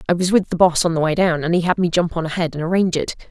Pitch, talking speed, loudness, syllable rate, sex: 170 Hz, 345 wpm, -18 LUFS, 7.3 syllables/s, female